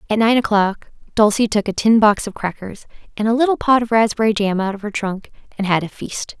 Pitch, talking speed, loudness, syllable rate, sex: 215 Hz, 235 wpm, -18 LUFS, 5.7 syllables/s, female